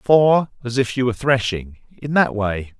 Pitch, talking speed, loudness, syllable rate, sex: 125 Hz, 170 wpm, -19 LUFS, 4.6 syllables/s, male